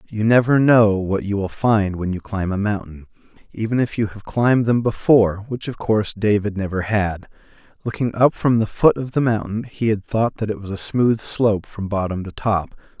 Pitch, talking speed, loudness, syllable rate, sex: 105 Hz, 210 wpm, -19 LUFS, 5.1 syllables/s, male